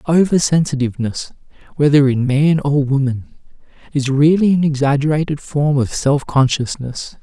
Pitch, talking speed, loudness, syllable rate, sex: 145 Hz, 125 wpm, -16 LUFS, 4.8 syllables/s, male